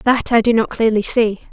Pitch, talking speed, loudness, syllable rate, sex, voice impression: 225 Hz, 235 wpm, -15 LUFS, 5.0 syllables/s, female, feminine, slightly gender-neutral, young, slightly adult-like, thin, slightly relaxed, slightly powerful, bright, slightly soft, slightly muffled, fluent, cute, intellectual, sincere, calm, friendly, slightly reassuring, unique, elegant, slightly sweet, lively, slightly strict, slightly sharp, slightly modest